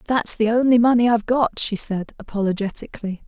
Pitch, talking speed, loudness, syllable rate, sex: 225 Hz, 165 wpm, -20 LUFS, 5.9 syllables/s, female